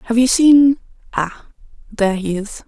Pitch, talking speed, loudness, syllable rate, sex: 230 Hz, 135 wpm, -16 LUFS, 4.7 syllables/s, female